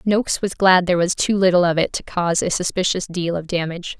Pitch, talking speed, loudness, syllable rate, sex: 180 Hz, 240 wpm, -19 LUFS, 6.2 syllables/s, female